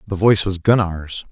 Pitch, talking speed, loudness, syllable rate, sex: 90 Hz, 180 wpm, -17 LUFS, 5.5 syllables/s, male